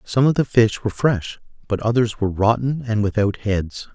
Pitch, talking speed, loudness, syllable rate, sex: 110 Hz, 200 wpm, -20 LUFS, 5.1 syllables/s, male